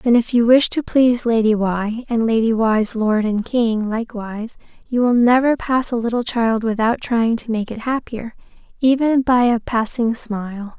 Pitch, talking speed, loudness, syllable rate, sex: 230 Hz, 185 wpm, -18 LUFS, 4.6 syllables/s, female